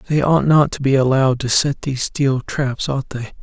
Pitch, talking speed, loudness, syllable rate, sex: 135 Hz, 230 wpm, -17 LUFS, 5.2 syllables/s, male